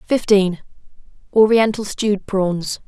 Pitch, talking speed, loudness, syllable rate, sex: 200 Hz, 65 wpm, -17 LUFS, 4.0 syllables/s, female